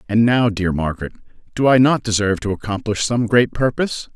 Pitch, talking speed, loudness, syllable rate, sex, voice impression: 110 Hz, 190 wpm, -18 LUFS, 6.0 syllables/s, male, masculine, middle-aged, thick, tensed, powerful, bright, clear, calm, mature, friendly, reassuring, wild, lively, kind, slightly strict